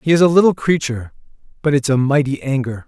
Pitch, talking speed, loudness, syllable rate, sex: 140 Hz, 210 wpm, -16 LUFS, 6.6 syllables/s, male